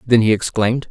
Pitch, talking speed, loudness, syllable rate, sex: 115 Hz, 200 wpm, -17 LUFS, 6.2 syllables/s, male